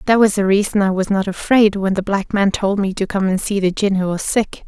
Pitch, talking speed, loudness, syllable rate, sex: 200 Hz, 295 wpm, -17 LUFS, 5.5 syllables/s, female